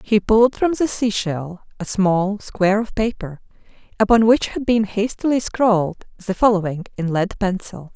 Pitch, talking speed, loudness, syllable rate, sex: 205 Hz, 160 wpm, -19 LUFS, 4.7 syllables/s, female